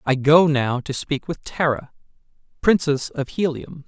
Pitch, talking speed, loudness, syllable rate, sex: 145 Hz, 155 wpm, -21 LUFS, 4.3 syllables/s, male